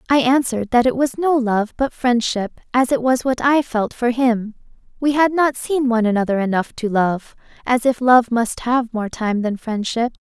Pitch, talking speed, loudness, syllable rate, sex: 240 Hz, 205 wpm, -18 LUFS, 4.1 syllables/s, female